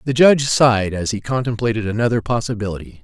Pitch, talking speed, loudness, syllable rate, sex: 110 Hz, 160 wpm, -18 LUFS, 6.5 syllables/s, male